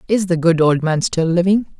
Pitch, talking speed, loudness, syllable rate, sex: 175 Hz, 235 wpm, -16 LUFS, 5.0 syllables/s, male